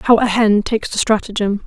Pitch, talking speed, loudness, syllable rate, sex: 215 Hz, 215 wpm, -16 LUFS, 5.5 syllables/s, female